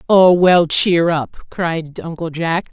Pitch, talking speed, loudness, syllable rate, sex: 170 Hz, 155 wpm, -15 LUFS, 3.2 syllables/s, female